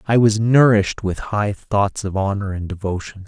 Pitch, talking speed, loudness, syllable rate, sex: 100 Hz, 185 wpm, -19 LUFS, 4.8 syllables/s, male